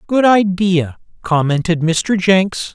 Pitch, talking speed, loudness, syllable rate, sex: 185 Hz, 110 wpm, -15 LUFS, 3.4 syllables/s, male